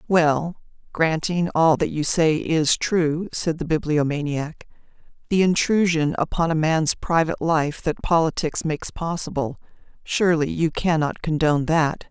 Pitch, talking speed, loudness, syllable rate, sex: 160 Hz, 130 wpm, -21 LUFS, 4.4 syllables/s, female